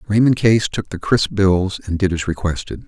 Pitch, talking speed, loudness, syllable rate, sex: 100 Hz, 210 wpm, -18 LUFS, 5.0 syllables/s, male